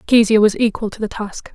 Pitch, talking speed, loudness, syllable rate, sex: 215 Hz, 230 wpm, -17 LUFS, 5.7 syllables/s, female